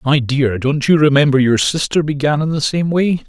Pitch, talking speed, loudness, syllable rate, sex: 145 Hz, 220 wpm, -15 LUFS, 5.1 syllables/s, male